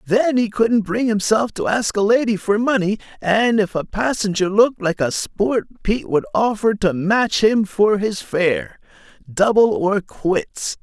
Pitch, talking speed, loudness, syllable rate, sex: 210 Hz, 165 wpm, -18 LUFS, 4.1 syllables/s, male